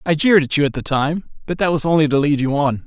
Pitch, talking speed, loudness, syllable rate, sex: 150 Hz, 315 wpm, -17 LUFS, 6.6 syllables/s, male